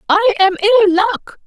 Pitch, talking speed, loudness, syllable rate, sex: 390 Hz, 165 wpm, -13 LUFS, 4.7 syllables/s, female